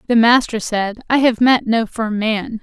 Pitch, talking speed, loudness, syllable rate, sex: 225 Hz, 205 wpm, -16 LUFS, 4.2 syllables/s, female